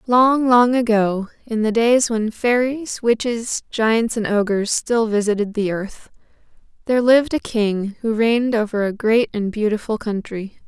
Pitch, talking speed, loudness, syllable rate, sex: 225 Hz, 155 wpm, -19 LUFS, 4.4 syllables/s, female